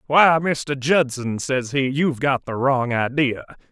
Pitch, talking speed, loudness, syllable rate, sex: 135 Hz, 160 wpm, -20 LUFS, 4.0 syllables/s, male